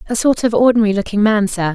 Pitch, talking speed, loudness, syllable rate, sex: 215 Hz, 240 wpm, -15 LUFS, 7.0 syllables/s, female